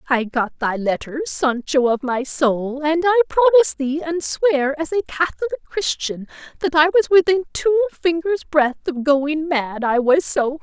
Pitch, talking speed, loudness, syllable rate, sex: 305 Hz, 180 wpm, -19 LUFS, 4.7 syllables/s, female